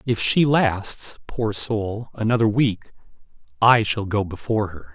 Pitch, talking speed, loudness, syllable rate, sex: 110 Hz, 145 wpm, -21 LUFS, 3.9 syllables/s, male